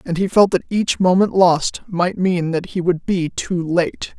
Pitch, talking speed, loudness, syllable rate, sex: 180 Hz, 215 wpm, -18 LUFS, 4.0 syllables/s, female